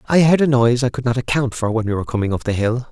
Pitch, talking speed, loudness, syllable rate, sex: 120 Hz, 330 wpm, -18 LUFS, 7.3 syllables/s, male